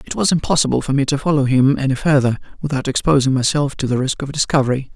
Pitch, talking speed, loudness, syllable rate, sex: 140 Hz, 220 wpm, -17 LUFS, 6.7 syllables/s, male